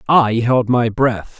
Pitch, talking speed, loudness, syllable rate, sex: 120 Hz, 170 wpm, -16 LUFS, 3.3 syllables/s, male